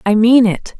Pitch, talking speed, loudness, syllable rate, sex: 225 Hz, 225 wpm, -12 LUFS, 4.6 syllables/s, female